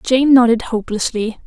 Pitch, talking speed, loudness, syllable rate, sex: 235 Hz, 125 wpm, -15 LUFS, 5.3 syllables/s, female